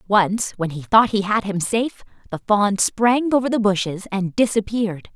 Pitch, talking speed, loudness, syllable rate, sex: 205 Hz, 185 wpm, -20 LUFS, 4.8 syllables/s, female